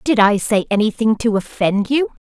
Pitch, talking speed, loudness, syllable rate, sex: 220 Hz, 185 wpm, -17 LUFS, 5.1 syllables/s, female